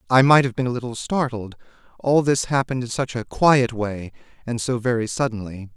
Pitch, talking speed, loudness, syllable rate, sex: 120 Hz, 200 wpm, -21 LUFS, 5.4 syllables/s, male